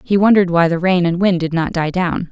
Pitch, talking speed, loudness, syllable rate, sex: 175 Hz, 285 wpm, -15 LUFS, 5.9 syllables/s, female